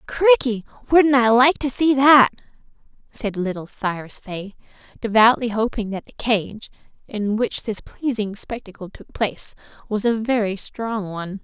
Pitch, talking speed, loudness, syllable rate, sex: 225 Hz, 145 wpm, -20 LUFS, 4.4 syllables/s, female